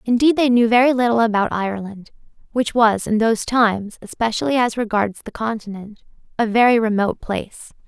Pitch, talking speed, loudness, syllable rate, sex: 225 Hz, 160 wpm, -18 LUFS, 5.6 syllables/s, female